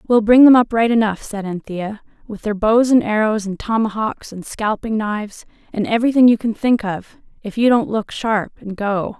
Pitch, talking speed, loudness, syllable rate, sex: 220 Hz, 200 wpm, -17 LUFS, 4.9 syllables/s, female